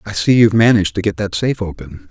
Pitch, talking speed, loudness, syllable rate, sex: 105 Hz, 255 wpm, -15 LUFS, 7.0 syllables/s, male